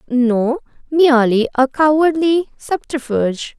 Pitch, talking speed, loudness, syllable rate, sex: 275 Hz, 85 wpm, -16 LUFS, 4.2 syllables/s, female